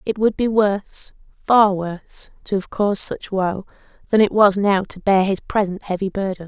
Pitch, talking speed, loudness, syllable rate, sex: 200 Hz, 195 wpm, -19 LUFS, 4.8 syllables/s, female